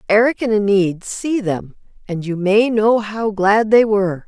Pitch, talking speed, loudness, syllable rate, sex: 205 Hz, 180 wpm, -16 LUFS, 4.5 syllables/s, female